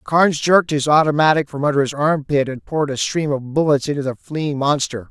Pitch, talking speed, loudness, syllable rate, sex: 145 Hz, 210 wpm, -18 LUFS, 5.8 syllables/s, male